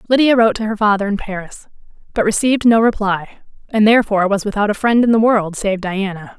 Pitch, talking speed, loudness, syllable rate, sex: 210 Hz, 205 wpm, -15 LUFS, 6.2 syllables/s, female